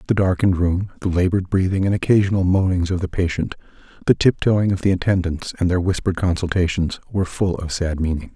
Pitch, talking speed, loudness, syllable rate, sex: 90 Hz, 195 wpm, -20 LUFS, 6.3 syllables/s, male